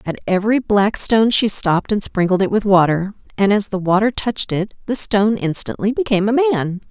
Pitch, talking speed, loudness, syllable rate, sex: 205 Hz, 200 wpm, -17 LUFS, 5.7 syllables/s, female